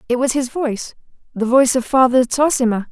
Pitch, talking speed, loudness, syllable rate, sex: 255 Hz, 185 wpm, -16 LUFS, 6.2 syllables/s, female